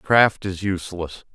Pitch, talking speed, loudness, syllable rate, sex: 95 Hz, 135 wpm, -22 LUFS, 4.1 syllables/s, male